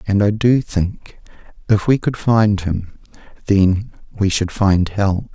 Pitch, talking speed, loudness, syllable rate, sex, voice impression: 100 Hz, 155 wpm, -17 LUFS, 3.6 syllables/s, male, very masculine, very middle-aged, very thick, relaxed, very weak, dark, very soft, very muffled, slightly halting, raspy, very cool, very intellectual, slightly refreshing, very sincere, very calm, very mature, very friendly, reassuring, very unique, elegant, very wild, sweet, slightly lively, very kind, modest